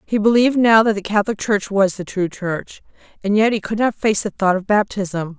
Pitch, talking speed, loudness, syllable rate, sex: 205 Hz, 235 wpm, -18 LUFS, 5.4 syllables/s, female